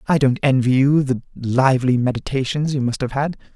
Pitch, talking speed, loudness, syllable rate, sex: 130 Hz, 185 wpm, -19 LUFS, 5.5 syllables/s, male